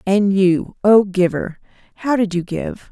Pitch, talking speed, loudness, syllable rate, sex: 195 Hz, 165 wpm, -17 LUFS, 3.8 syllables/s, female